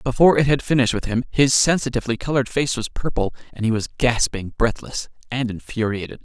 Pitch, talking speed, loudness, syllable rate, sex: 125 Hz, 175 wpm, -21 LUFS, 6.3 syllables/s, male